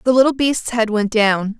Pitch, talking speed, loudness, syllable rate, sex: 230 Hz, 225 wpm, -16 LUFS, 4.8 syllables/s, female